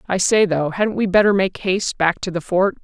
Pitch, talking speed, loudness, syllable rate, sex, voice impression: 190 Hz, 255 wpm, -18 LUFS, 5.3 syllables/s, female, very feminine, slightly young, slightly adult-like, slightly thin, tensed, slightly powerful, slightly dark, hard, clear, fluent, cool, very intellectual, slightly refreshing, very sincere, very calm, friendly, reassuring, unique, very wild, slightly lively, strict, slightly sharp, slightly modest